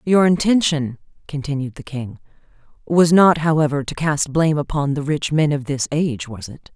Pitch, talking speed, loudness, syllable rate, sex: 145 Hz, 180 wpm, -19 LUFS, 5.1 syllables/s, female